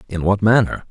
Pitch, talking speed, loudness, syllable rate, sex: 100 Hz, 200 wpm, -16 LUFS, 5.6 syllables/s, male